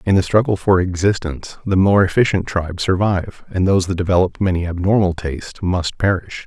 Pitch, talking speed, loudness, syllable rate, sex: 90 Hz, 175 wpm, -18 LUFS, 5.9 syllables/s, male